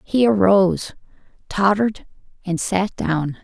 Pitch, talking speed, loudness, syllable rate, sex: 195 Hz, 105 wpm, -19 LUFS, 4.2 syllables/s, female